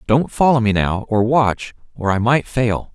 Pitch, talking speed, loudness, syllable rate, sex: 115 Hz, 205 wpm, -17 LUFS, 4.3 syllables/s, male